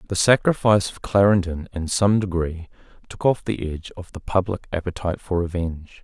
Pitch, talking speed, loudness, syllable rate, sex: 95 Hz, 170 wpm, -22 LUFS, 5.6 syllables/s, male